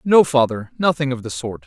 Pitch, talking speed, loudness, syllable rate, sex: 140 Hz, 215 wpm, -19 LUFS, 5.4 syllables/s, male